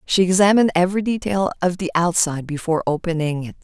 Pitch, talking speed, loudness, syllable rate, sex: 175 Hz, 165 wpm, -19 LUFS, 6.7 syllables/s, female